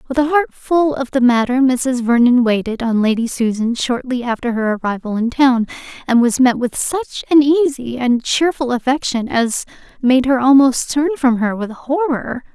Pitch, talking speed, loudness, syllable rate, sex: 255 Hz, 180 wpm, -16 LUFS, 4.6 syllables/s, female